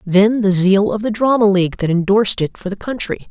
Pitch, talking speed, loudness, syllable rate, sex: 200 Hz, 235 wpm, -15 LUFS, 5.6 syllables/s, female